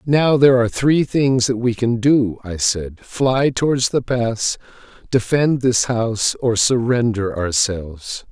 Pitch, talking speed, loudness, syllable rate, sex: 120 Hz, 150 wpm, -17 LUFS, 3.9 syllables/s, male